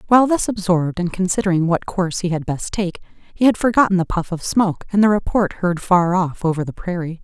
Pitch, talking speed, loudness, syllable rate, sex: 185 Hz, 225 wpm, -19 LUFS, 5.9 syllables/s, female